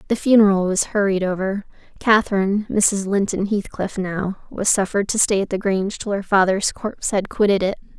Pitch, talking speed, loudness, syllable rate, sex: 200 Hz, 180 wpm, -19 LUFS, 5.5 syllables/s, female